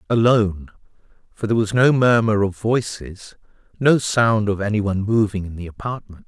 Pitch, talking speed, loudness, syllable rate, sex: 105 Hz, 165 wpm, -19 LUFS, 5.3 syllables/s, male